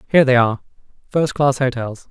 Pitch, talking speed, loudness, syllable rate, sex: 130 Hz, 115 wpm, -17 LUFS, 6.0 syllables/s, male